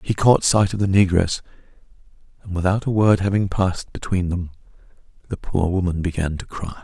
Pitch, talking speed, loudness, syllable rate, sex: 95 Hz, 175 wpm, -20 LUFS, 5.5 syllables/s, male